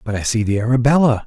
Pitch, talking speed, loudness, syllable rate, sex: 120 Hz, 240 wpm, -16 LUFS, 6.8 syllables/s, male